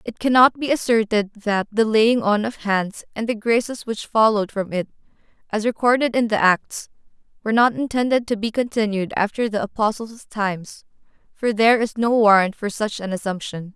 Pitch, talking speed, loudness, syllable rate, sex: 220 Hz, 180 wpm, -20 LUFS, 5.2 syllables/s, female